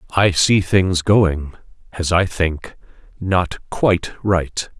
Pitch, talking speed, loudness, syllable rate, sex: 90 Hz, 125 wpm, -18 LUFS, 3.0 syllables/s, male